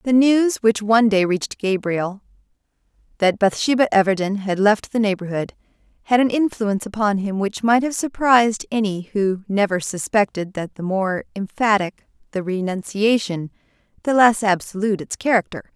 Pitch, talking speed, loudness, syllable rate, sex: 210 Hz, 145 wpm, -19 LUFS, 5.1 syllables/s, female